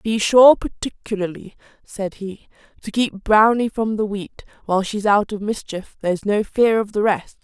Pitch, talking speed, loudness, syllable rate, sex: 210 Hz, 180 wpm, -19 LUFS, 4.6 syllables/s, female